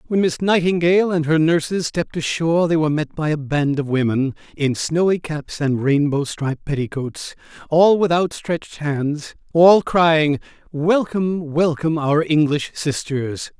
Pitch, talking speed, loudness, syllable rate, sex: 155 Hz, 150 wpm, -19 LUFS, 4.6 syllables/s, male